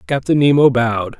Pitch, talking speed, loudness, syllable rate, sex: 130 Hz, 150 wpm, -14 LUFS, 5.7 syllables/s, male